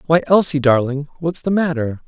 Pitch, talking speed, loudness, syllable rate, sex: 150 Hz, 175 wpm, -17 LUFS, 5.2 syllables/s, male